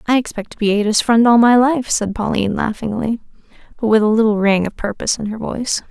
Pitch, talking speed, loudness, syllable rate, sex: 220 Hz, 225 wpm, -16 LUFS, 6.2 syllables/s, female